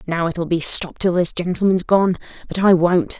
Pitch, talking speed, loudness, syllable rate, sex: 175 Hz, 205 wpm, -18 LUFS, 4.8 syllables/s, female